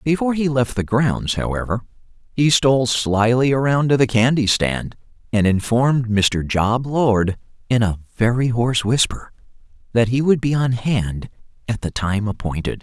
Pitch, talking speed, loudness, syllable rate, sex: 120 Hz, 160 wpm, -19 LUFS, 4.7 syllables/s, male